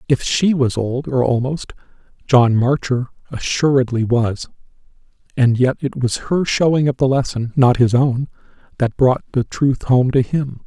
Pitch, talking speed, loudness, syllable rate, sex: 130 Hz, 165 wpm, -17 LUFS, 4.4 syllables/s, male